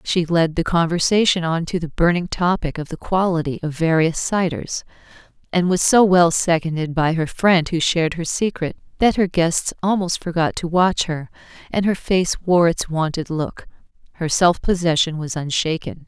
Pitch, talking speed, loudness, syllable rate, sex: 170 Hz, 175 wpm, -19 LUFS, 4.8 syllables/s, female